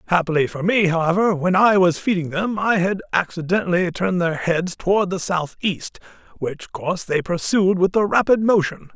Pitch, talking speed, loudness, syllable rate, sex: 180 Hz, 175 wpm, -19 LUFS, 5.2 syllables/s, male